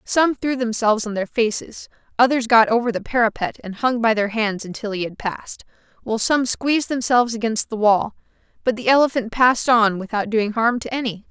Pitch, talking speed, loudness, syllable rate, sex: 230 Hz, 195 wpm, -19 LUFS, 5.6 syllables/s, female